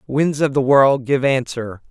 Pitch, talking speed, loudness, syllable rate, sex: 135 Hz, 190 wpm, -17 LUFS, 4.1 syllables/s, female